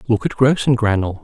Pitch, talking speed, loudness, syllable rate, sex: 120 Hz, 145 wpm, -17 LUFS, 5.6 syllables/s, male